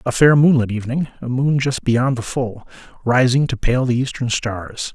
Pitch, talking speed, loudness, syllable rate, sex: 125 Hz, 180 wpm, -18 LUFS, 4.8 syllables/s, male